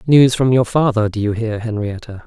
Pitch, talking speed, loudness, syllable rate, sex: 115 Hz, 210 wpm, -16 LUFS, 5.2 syllables/s, male